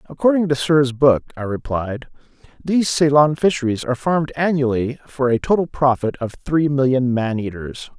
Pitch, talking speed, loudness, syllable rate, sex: 135 Hz, 160 wpm, -18 LUFS, 5.1 syllables/s, male